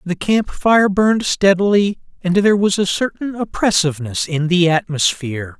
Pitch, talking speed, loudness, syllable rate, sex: 185 Hz, 140 wpm, -16 LUFS, 5.1 syllables/s, male